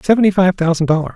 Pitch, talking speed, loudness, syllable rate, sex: 180 Hz, 210 wpm, -14 LUFS, 7.2 syllables/s, male